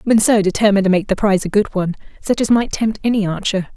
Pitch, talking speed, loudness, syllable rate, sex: 205 Hz, 240 wpm, -16 LUFS, 7.0 syllables/s, female